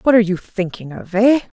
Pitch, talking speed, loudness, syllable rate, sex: 205 Hz, 230 wpm, -17 LUFS, 6.1 syllables/s, female